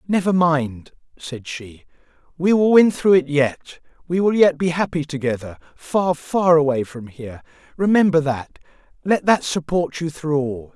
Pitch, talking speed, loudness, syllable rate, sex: 155 Hz, 145 wpm, -19 LUFS, 4.6 syllables/s, male